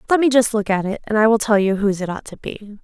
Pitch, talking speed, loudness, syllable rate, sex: 215 Hz, 340 wpm, -18 LUFS, 6.7 syllables/s, female